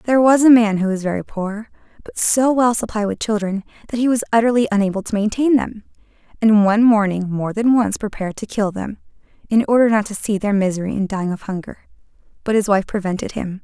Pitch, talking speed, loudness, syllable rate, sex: 210 Hz, 210 wpm, -18 LUFS, 6.0 syllables/s, female